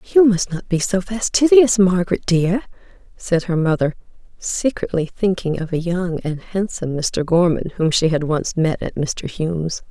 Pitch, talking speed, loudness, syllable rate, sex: 180 Hz, 170 wpm, -19 LUFS, 4.7 syllables/s, female